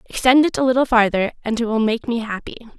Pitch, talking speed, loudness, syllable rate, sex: 235 Hz, 235 wpm, -18 LUFS, 6.4 syllables/s, female